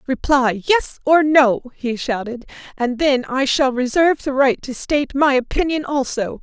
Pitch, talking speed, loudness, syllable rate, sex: 265 Hz, 170 wpm, -18 LUFS, 4.5 syllables/s, female